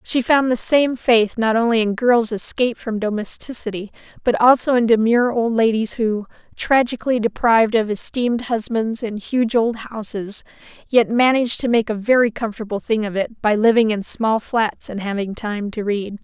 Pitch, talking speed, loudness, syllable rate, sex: 225 Hz, 175 wpm, -18 LUFS, 5.1 syllables/s, female